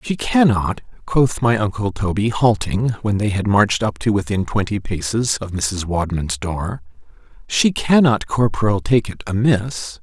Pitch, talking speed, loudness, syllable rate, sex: 105 Hz, 150 wpm, -19 LUFS, 4.2 syllables/s, male